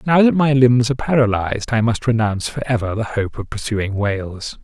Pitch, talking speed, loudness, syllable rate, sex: 115 Hz, 205 wpm, -18 LUFS, 5.6 syllables/s, male